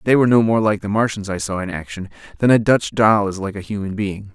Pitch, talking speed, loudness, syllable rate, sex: 105 Hz, 275 wpm, -18 LUFS, 6.1 syllables/s, male